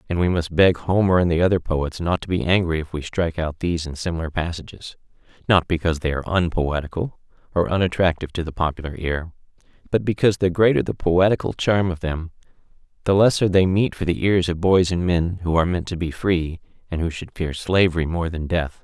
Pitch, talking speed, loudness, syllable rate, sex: 85 Hz, 215 wpm, -21 LUFS, 6.1 syllables/s, male